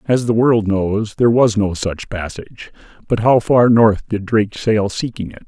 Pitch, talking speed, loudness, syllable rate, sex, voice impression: 110 Hz, 195 wpm, -16 LUFS, 4.6 syllables/s, male, very masculine, very adult-like, old, very thick, tensed, very powerful, slightly bright, hard, slightly muffled, slightly fluent, very cool, very intellectual, very sincere, very calm, very mature, friendly, very reassuring, unique, very wild, sweet, slightly lively, very kind, slightly modest